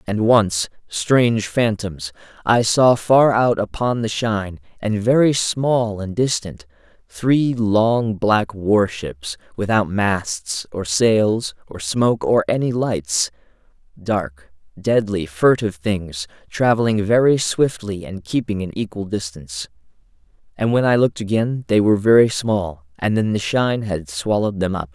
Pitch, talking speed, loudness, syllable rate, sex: 105 Hz, 135 wpm, -19 LUFS, 4.1 syllables/s, male